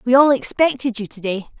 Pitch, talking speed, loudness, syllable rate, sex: 240 Hz, 225 wpm, -18 LUFS, 5.6 syllables/s, female